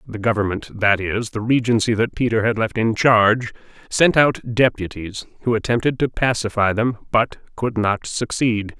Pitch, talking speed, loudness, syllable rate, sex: 110 Hz, 150 wpm, -19 LUFS, 4.7 syllables/s, male